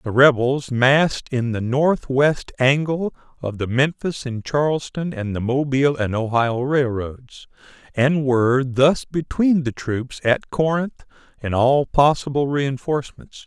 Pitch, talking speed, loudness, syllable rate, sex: 135 Hz, 135 wpm, -20 LUFS, 4.1 syllables/s, male